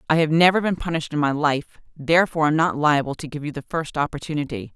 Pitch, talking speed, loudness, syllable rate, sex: 150 Hz, 240 wpm, -21 LUFS, 7.1 syllables/s, female